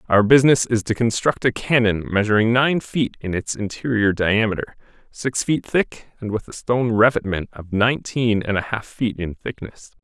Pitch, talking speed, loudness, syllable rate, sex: 110 Hz, 180 wpm, -20 LUFS, 5.0 syllables/s, male